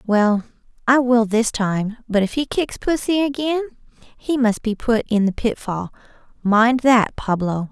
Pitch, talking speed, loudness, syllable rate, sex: 235 Hz, 155 wpm, -19 LUFS, 4.2 syllables/s, female